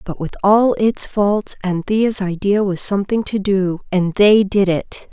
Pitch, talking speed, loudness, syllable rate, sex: 200 Hz, 175 wpm, -17 LUFS, 4.0 syllables/s, female